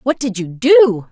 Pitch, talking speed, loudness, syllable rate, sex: 240 Hz, 215 wpm, -14 LUFS, 4.0 syllables/s, female